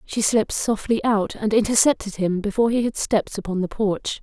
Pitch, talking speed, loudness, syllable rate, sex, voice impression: 210 Hz, 200 wpm, -21 LUFS, 5.6 syllables/s, female, very feminine, slightly young, adult-like, very thin, slightly tensed, weak, slightly bright, soft, muffled, very fluent, raspy, cute, very intellectual, refreshing, very sincere, slightly calm, friendly, reassuring, very unique, elegant, wild, sweet, lively, very kind, slightly intense, modest, light